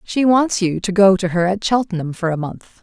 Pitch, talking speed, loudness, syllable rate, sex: 195 Hz, 255 wpm, -17 LUFS, 5.1 syllables/s, female